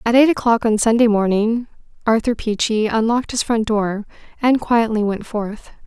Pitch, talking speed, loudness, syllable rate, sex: 225 Hz, 165 wpm, -18 LUFS, 4.9 syllables/s, female